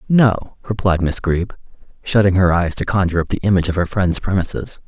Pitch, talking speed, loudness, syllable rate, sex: 95 Hz, 195 wpm, -18 LUFS, 5.9 syllables/s, male